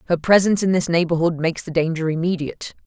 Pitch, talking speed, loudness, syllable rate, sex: 170 Hz, 190 wpm, -19 LUFS, 7.0 syllables/s, female